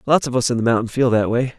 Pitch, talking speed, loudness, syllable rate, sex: 120 Hz, 340 wpm, -18 LUFS, 7.0 syllables/s, male